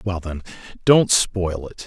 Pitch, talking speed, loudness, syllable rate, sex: 95 Hz, 160 wpm, -19 LUFS, 3.7 syllables/s, male